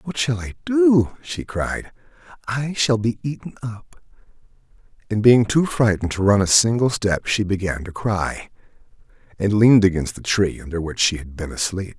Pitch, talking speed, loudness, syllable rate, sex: 105 Hz, 175 wpm, -20 LUFS, 4.8 syllables/s, male